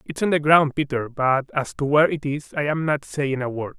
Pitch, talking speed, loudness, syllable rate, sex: 145 Hz, 270 wpm, -21 LUFS, 5.3 syllables/s, male